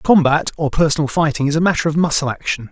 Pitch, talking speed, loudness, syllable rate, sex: 155 Hz, 220 wpm, -17 LUFS, 6.5 syllables/s, male